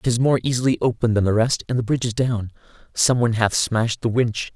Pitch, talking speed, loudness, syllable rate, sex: 115 Hz, 210 wpm, -20 LUFS, 6.2 syllables/s, male